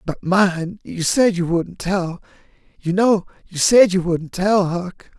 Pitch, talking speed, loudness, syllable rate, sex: 185 Hz, 175 wpm, -18 LUFS, 3.6 syllables/s, male